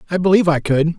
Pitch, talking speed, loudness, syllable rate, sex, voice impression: 165 Hz, 245 wpm, -16 LUFS, 7.9 syllables/s, male, masculine, very adult-like, slightly muffled, slightly refreshing, sincere, slightly elegant